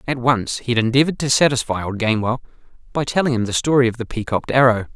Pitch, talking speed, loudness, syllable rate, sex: 120 Hz, 220 wpm, -19 LUFS, 7.2 syllables/s, male